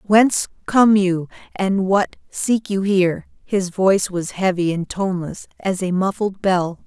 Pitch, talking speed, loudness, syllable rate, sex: 190 Hz, 155 wpm, -19 LUFS, 4.3 syllables/s, female